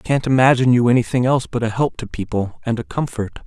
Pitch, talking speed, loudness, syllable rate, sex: 120 Hz, 240 wpm, -18 LUFS, 6.7 syllables/s, male